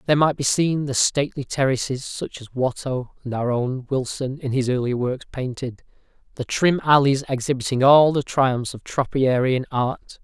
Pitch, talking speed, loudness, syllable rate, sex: 130 Hz, 165 wpm, -21 LUFS, 4.8 syllables/s, male